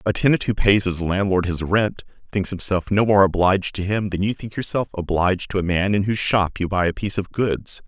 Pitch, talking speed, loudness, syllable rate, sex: 95 Hz, 245 wpm, -21 LUFS, 5.7 syllables/s, male